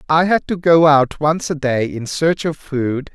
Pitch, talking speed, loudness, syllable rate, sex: 150 Hz, 230 wpm, -16 LUFS, 4.1 syllables/s, male